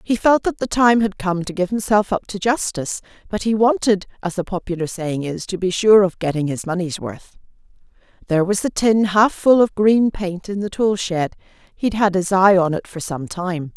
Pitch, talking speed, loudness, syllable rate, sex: 195 Hz, 220 wpm, -19 LUFS, 5.1 syllables/s, female